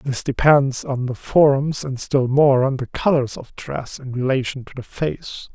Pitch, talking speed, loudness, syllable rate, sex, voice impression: 135 Hz, 195 wpm, -19 LUFS, 4.1 syllables/s, male, masculine, adult-like, thick, slightly relaxed, slightly powerful, slightly weak, slightly muffled, raspy, intellectual, calm, friendly, reassuring, slightly wild, slightly lively, kind, slightly modest